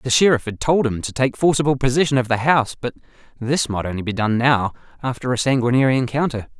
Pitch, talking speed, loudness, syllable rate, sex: 125 Hz, 210 wpm, -19 LUFS, 6.4 syllables/s, male